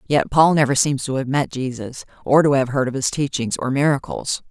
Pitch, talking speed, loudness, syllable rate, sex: 135 Hz, 225 wpm, -19 LUFS, 5.4 syllables/s, female